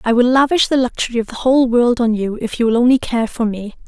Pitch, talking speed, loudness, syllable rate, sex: 240 Hz, 280 wpm, -16 LUFS, 6.3 syllables/s, female